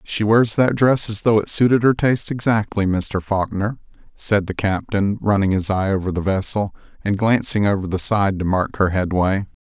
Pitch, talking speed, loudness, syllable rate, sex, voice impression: 100 Hz, 195 wpm, -19 LUFS, 4.9 syllables/s, male, masculine, middle-aged, tensed, hard, intellectual, sincere, friendly, reassuring, wild, lively, kind, slightly modest